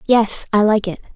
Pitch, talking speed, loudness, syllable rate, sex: 210 Hz, 205 wpm, -17 LUFS, 4.7 syllables/s, female